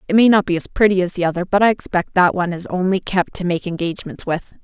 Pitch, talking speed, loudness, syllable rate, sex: 185 Hz, 270 wpm, -18 LUFS, 6.6 syllables/s, female